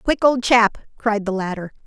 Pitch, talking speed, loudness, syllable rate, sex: 220 Hz, 195 wpm, -19 LUFS, 4.6 syllables/s, female